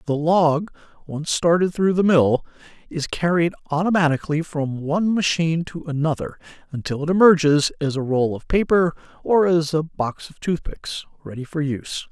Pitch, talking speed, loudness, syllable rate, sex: 160 Hz, 165 wpm, -21 LUFS, 5.1 syllables/s, male